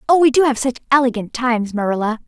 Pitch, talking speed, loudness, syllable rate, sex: 245 Hz, 210 wpm, -17 LUFS, 6.9 syllables/s, female